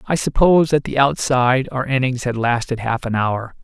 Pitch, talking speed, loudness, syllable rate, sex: 130 Hz, 200 wpm, -18 LUFS, 5.2 syllables/s, male